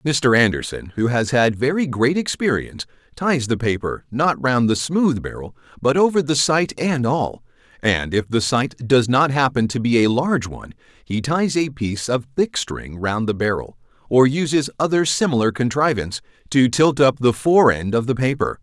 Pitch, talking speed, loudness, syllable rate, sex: 130 Hz, 185 wpm, -19 LUFS, 4.8 syllables/s, male